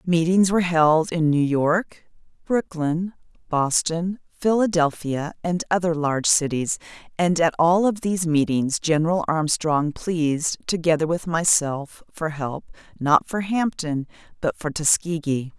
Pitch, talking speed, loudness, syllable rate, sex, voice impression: 165 Hz, 125 wpm, -22 LUFS, 4.2 syllables/s, female, very feminine, adult-like, intellectual, slightly calm